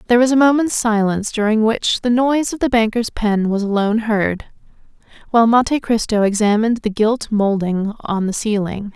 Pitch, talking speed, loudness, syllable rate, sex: 220 Hz, 175 wpm, -17 LUFS, 5.5 syllables/s, female